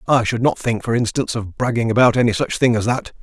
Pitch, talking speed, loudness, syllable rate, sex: 115 Hz, 260 wpm, -18 LUFS, 6.3 syllables/s, male